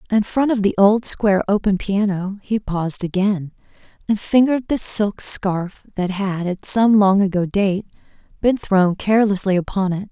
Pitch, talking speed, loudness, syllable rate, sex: 200 Hz, 165 wpm, -18 LUFS, 4.7 syllables/s, female